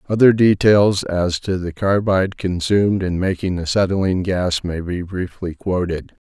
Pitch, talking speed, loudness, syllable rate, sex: 95 Hz, 145 wpm, -18 LUFS, 4.7 syllables/s, male